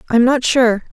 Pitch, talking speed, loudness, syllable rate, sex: 240 Hz, 245 wpm, -14 LUFS, 5.8 syllables/s, female